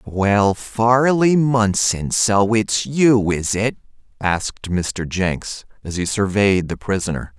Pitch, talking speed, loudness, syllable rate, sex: 105 Hz, 130 wpm, -18 LUFS, 3.3 syllables/s, male